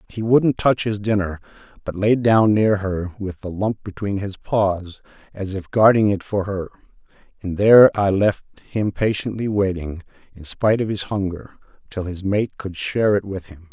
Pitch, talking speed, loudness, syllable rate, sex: 100 Hz, 185 wpm, -20 LUFS, 4.7 syllables/s, male